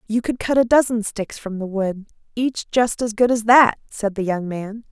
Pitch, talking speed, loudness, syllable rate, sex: 220 Hz, 230 wpm, -20 LUFS, 4.6 syllables/s, female